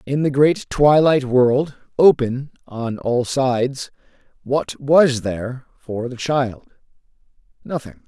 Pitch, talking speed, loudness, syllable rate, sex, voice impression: 130 Hz, 120 wpm, -19 LUFS, 3.5 syllables/s, male, masculine, middle-aged, thick, tensed, powerful, bright, raspy, mature, friendly, wild, lively, slightly strict, intense